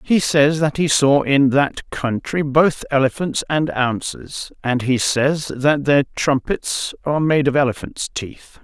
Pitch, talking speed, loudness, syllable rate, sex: 140 Hz, 160 wpm, -18 LUFS, 3.9 syllables/s, male